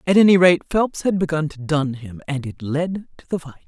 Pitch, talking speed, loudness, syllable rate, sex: 160 Hz, 245 wpm, -20 LUFS, 5.4 syllables/s, female